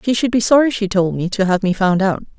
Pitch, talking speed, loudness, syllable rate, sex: 205 Hz, 300 wpm, -16 LUFS, 6.1 syllables/s, female